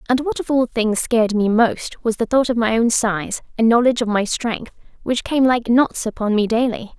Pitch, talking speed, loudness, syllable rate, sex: 230 Hz, 230 wpm, -18 LUFS, 5.1 syllables/s, female